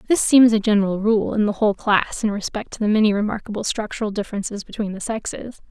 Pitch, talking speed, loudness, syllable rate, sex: 210 Hz, 210 wpm, -20 LUFS, 6.5 syllables/s, female